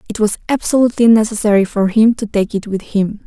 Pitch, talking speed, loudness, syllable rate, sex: 215 Hz, 200 wpm, -14 LUFS, 6.2 syllables/s, female